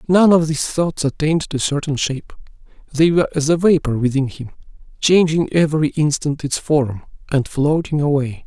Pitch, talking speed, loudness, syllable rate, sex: 150 Hz, 165 wpm, -17 LUFS, 5.4 syllables/s, male